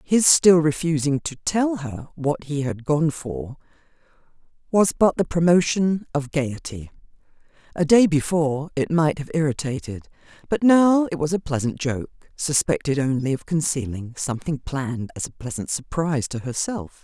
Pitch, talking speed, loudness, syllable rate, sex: 150 Hz, 150 wpm, -22 LUFS, 4.8 syllables/s, female